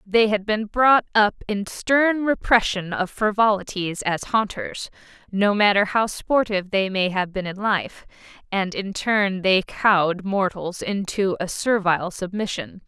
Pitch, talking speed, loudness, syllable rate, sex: 200 Hz, 140 wpm, -21 LUFS, 4.2 syllables/s, female